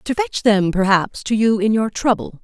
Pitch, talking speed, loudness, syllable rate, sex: 215 Hz, 220 wpm, -17 LUFS, 4.6 syllables/s, female